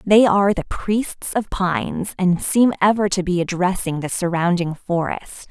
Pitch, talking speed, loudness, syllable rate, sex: 185 Hz, 165 wpm, -19 LUFS, 4.4 syllables/s, female